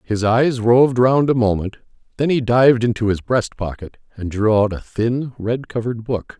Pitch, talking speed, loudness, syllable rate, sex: 115 Hz, 195 wpm, -18 LUFS, 4.9 syllables/s, male